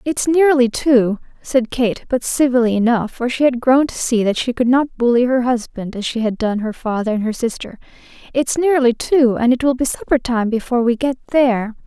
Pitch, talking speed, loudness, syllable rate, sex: 245 Hz, 215 wpm, -17 LUFS, 5.1 syllables/s, female